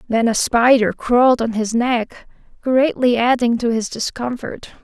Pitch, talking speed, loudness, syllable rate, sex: 235 Hz, 150 wpm, -17 LUFS, 4.3 syllables/s, female